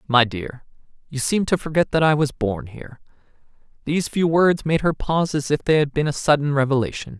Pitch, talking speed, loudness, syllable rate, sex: 145 Hz, 210 wpm, -20 LUFS, 5.7 syllables/s, male